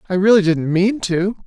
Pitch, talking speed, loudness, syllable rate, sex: 190 Hz, 205 wpm, -16 LUFS, 4.9 syllables/s, male